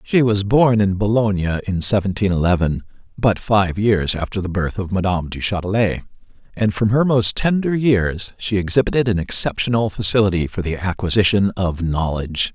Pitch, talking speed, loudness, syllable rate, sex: 100 Hz, 155 wpm, -18 LUFS, 5.3 syllables/s, male